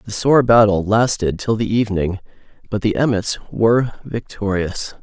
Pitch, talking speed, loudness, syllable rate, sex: 105 Hz, 145 wpm, -18 LUFS, 4.7 syllables/s, male